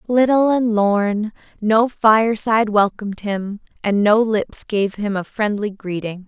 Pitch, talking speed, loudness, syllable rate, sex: 210 Hz, 145 wpm, -18 LUFS, 4.1 syllables/s, female